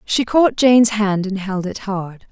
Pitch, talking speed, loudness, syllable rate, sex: 205 Hz, 210 wpm, -17 LUFS, 4.1 syllables/s, female